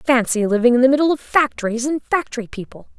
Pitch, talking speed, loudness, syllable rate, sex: 250 Hz, 200 wpm, -18 LUFS, 6.2 syllables/s, female